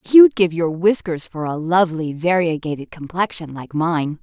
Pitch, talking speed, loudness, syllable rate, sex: 170 Hz, 155 wpm, -19 LUFS, 4.8 syllables/s, female